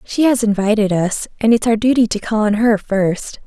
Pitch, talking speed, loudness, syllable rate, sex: 215 Hz, 225 wpm, -16 LUFS, 5.0 syllables/s, female